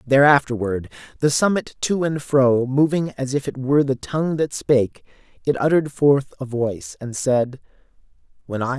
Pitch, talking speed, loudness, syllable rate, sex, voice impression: 135 Hz, 165 wpm, -20 LUFS, 5.1 syllables/s, male, very masculine, very middle-aged, very thick, tensed, very powerful, slightly bright, slightly soft, clear, fluent, very cool, intellectual, very sincere, very calm, mature, friendly, reassuring, wild, slightly sweet, slightly lively, slightly strict, slightly intense